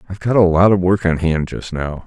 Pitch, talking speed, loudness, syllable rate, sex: 90 Hz, 290 wpm, -16 LUFS, 5.9 syllables/s, male